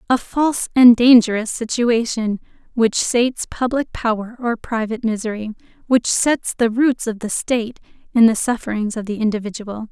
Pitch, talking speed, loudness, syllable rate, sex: 230 Hz, 150 wpm, -18 LUFS, 5.0 syllables/s, female